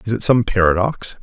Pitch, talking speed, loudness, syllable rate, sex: 105 Hz, 195 wpm, -17 LUFS, 5.4 syllables/s, male